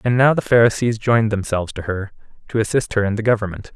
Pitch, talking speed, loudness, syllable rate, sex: 110 Hz, 225 wpm, -18 LUFS, 6.7 syllables/s, male